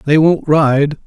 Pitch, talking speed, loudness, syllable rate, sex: 150 Hz, 170 wpm, -13 LUFS, 3.5 syllables/s, male